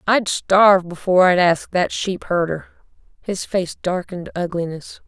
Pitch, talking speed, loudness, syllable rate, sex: 180 Hz, 140 wpm, -19 LUFS, 4.9 syllables/s, female